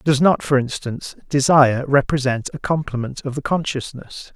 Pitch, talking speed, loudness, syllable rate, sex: 140 Hz, 150 wpm, -19 LUFS, 5.1 syllables/s, male